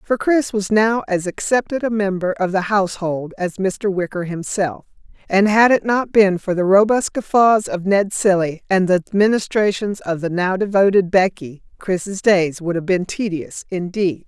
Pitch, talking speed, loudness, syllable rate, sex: 195 Hz, 175 wpm, -18 LUFS, 4.5 syllables/s, female